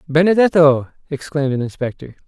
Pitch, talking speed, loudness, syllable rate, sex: 150 Hz, 105 wpm, -16 LUFS, 6.0 syllables/s, male